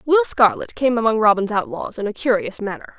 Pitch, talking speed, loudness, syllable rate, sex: 220 Hz, 200 wpm, -19 LUFS, 5.6 syllables/s, female